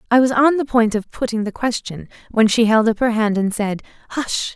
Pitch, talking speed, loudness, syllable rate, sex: 230 Hz, 235 wpm, -18 LUFS, 5.3 syllables/s, female